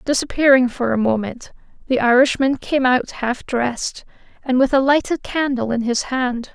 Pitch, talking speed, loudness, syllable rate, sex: 255 Hz, 165 wpm, -18 LUFS, 4.7 syllables/s, female